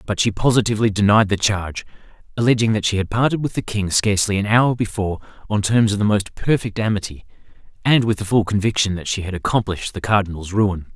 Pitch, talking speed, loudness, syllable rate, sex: 105 Hz, 205 wpm, -19 LUFS, 6.4 syllables/s, male